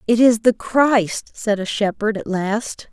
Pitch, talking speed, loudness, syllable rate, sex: 220 Hz, 185 wpm, -19 LUFS, 3.8 syllables/s, female